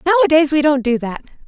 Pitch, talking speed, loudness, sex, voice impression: 295 Hz, 205 wpm, -15 LUFS, female, very feminine, very young, very thin, very tensed, powerful, very bright, slightly hard, very clear, fluent, slightly nasal, very cute, slightly intellectual, very refreshing, sincere, slightly calm, friendly, reassuring, very unique, slightly elegant, slightly wild, sweet, very lively, intense, very sharp, very light